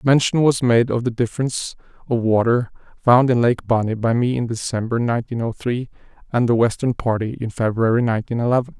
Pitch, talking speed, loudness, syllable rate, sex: 120 Hz, 185 wpm, -19 LUFS, 5.9 syllables/s, male